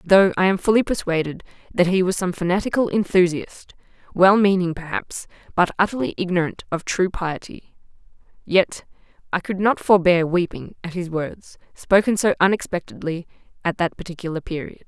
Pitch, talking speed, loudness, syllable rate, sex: 180 Hz, 145 wpm, -21 LUFS, 5.3 syllables/s, female